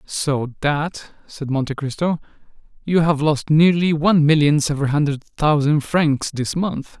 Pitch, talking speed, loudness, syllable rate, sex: 150 Hz, 145 wpm, -19 LUFS, 4.2 syllables/s, male